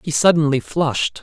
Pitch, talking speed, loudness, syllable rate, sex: 155 Hz, 145 wpm, -17 LUFS, 5.3 syllables/s, male